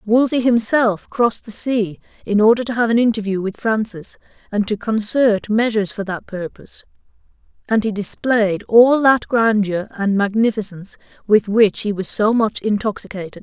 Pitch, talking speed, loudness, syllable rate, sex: 215 Hz, 155 wpm, -18 LUFS, 4.9 syllables/s, female